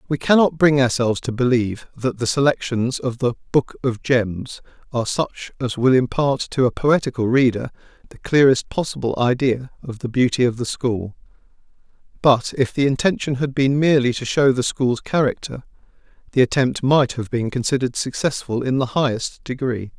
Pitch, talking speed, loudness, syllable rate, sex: 130 Hz, 170 wpm, -20 LUFS, 5.2 syllables/s, male